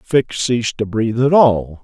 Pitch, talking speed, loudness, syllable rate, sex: 120 Hz, 195 wpm, -16 LUFS, 4.6 syllables/s, male